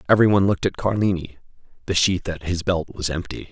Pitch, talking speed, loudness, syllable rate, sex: 90 Hz, 205 wpm, -21 LUFS, 6.7 syllables/s, male